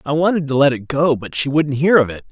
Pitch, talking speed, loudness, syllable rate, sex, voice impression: 145 Hz, 310 wpm, -16 LUFS, 6.1 syllables/s, male, masculine, adult-like, slightly fluent, slightly refreshing, sincere, friendly